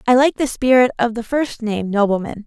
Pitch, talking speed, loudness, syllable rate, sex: 235 Hz, 220 wpm, -17 LUFS, 5.8 syllables/s, female